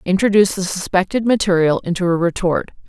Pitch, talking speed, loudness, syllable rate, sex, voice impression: 185 Hz, 145 wpm, -17 LUFS, 6.1 syllables/s, female, feminine, adult-like, tensed, slightly powerful, hard, clear, fluent, intellectual, elegant, lively, sharp